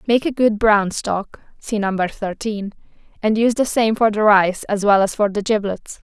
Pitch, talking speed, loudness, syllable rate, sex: 210 Hz, 205 wpm, -18 LUFS, 4.5 syllables/s, female